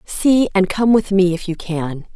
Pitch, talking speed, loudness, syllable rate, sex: 190 Hz, 225 wpm, -17 LUFS, 4.1 syllables/s, female